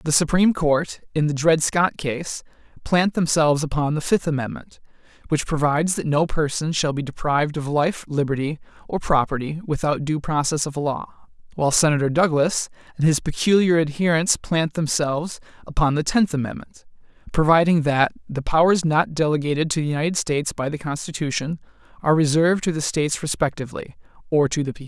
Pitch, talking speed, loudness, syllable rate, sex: 155 Hz, 165 wpm, -21 LUFS, 5.6 syllables/s, male